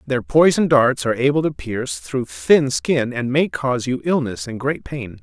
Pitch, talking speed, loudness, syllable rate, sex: 130 Hz, 205 wpm, -19 LUFS, 4.7 syllables/s, male